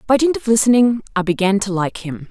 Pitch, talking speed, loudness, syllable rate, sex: 210 Hz, 235 wpm, -16 LUFS, 5.9 syllables/s, female